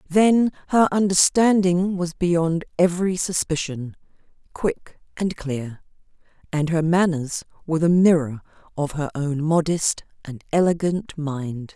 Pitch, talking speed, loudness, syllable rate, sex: 165 Hz, 115 wpm, -21 LUFS, 4.0 syllables/s, female